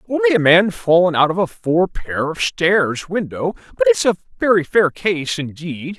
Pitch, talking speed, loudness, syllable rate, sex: 180 Hz, 190 wpm, -17 LUFS, 4.4 syllables/s, male